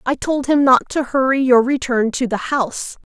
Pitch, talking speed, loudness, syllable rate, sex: 260 Hz, 210 wpm, -17 LUFS, 5.0 syllables/s, female